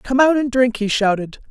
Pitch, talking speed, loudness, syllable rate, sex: 240 Hz, 240 wpm, -17 LUFS, 5.1 syllables/s, female